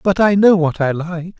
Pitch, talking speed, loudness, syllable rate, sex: 175 Hz, 260 wpm, -15 LUFS, 4.7 syllables/s, male